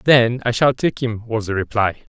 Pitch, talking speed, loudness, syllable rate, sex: 115 Hz, 225 wpm, -19 LUFS, 4.5 syllables/s, male